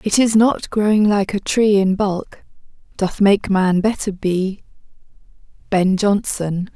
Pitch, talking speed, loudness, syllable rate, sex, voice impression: 200 Hz, 140 wpm, -17 LUFS, 3.8 syllables/s, female, feminine, slightly adult-like, slightly fluent, slightly intellectual, slightly calm